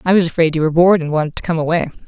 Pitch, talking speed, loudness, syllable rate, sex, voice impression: 165 Hz, 320 wpm, -15 LUFS, 8.7 syllables/s, female, very feminine, very adult-like, very thin, tensed, powerful, slightly bright, hard, clear, fluent, slightly raspy, cool, very intellectual, very refreshing, sincere, slightly calm, slightly friendly, reassuring, very unique, elegant, wild, slightly sweet, lively, strict, intense, sharp, slightly light